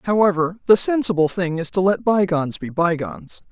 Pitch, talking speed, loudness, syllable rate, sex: 180 Hz, 170 wpm, -19 LUFS, 5.6 syllables/s, female